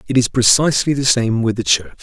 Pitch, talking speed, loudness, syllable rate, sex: 120 Hz, 240 wpm, -15 LUFS, 5.9 syllables/s, male